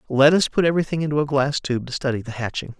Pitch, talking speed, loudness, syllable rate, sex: 140 Hz, 260 wpm, -21 LUFS, 6.9 syllables/s, male